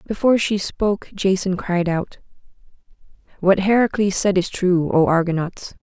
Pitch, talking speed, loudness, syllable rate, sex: 190 Hz, 135 wpm, -19 LUFS, 4.7 syllables/s, female